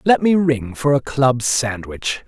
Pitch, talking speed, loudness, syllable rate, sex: 130 Hz, 185 wpm, -18 LUFS, 3.7 syllables/s, male